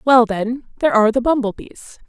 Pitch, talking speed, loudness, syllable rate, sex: 240 Hz, 200 wpm, -17 LUFS, 5.8 syllables/s, female